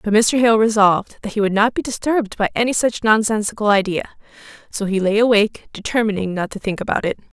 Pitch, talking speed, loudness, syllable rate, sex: 215 Hz, 205 wpm, -18 LUFS, 6.2 syllables/s, female